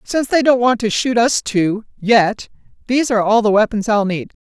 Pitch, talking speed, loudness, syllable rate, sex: 225 Hz, 190 wpm, -16 LUFS, 5.3 syllables/s, female